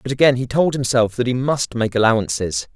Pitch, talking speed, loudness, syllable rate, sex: 125 Hz, 220 wpm, -18 LUFS, 5.6 syllables/s, male